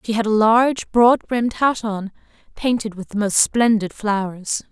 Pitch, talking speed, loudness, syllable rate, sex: 220 Hz, 180 wpm, -19 LUFS, 4.6 syllables/s, female